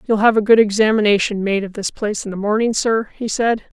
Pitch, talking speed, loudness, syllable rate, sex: 210 Hz, 240 wpm, -17 LUFS, 5.9 syllables/s, female